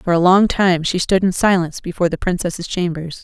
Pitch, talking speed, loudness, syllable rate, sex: 180 Hz, 220 wpm, -17 LUFS, 6.0 syllables/s, female